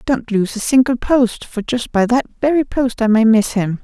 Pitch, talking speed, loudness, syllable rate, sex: 235 Hz, 235 wpm, -16 LUFS, 4.6 syllables/s, female